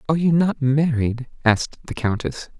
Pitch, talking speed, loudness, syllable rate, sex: 135 Hz, 160 wpm, -21 LUFS, 5.2 syllables/s, male